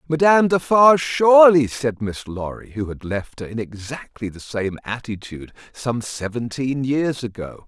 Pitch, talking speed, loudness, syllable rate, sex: 125 Hz, 150 wpm, -19 LUFS, 4.7 syllables/s, male